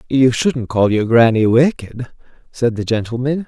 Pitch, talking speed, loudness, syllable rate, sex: 125 Hz, 155 wpm, -15 LUFS, 4.5 syllables/s, male